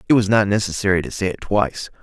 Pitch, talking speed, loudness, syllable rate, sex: 100 Hz, 235 wpm, -19 LUFS, 7.0 syllables/s, male